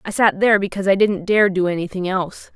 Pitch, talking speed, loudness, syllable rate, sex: 190 Hz, 235 wpm, -18 LUFS, 6.5 syllables/s, female